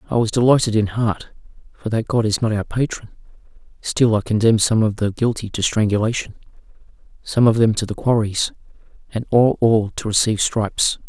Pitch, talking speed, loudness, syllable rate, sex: 110 Hz, 175 wpm, -19 LUFS, 5.5 syllables/s, male